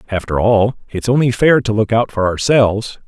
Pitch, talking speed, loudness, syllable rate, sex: 110 Hz, 195 wpm, -15 LUFS, 5.1 syllables/s, male